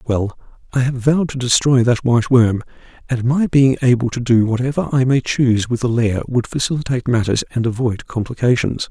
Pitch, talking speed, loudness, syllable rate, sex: 125 Hz, 190 wpm, -17 LUFS, 5.7 syllables/s, male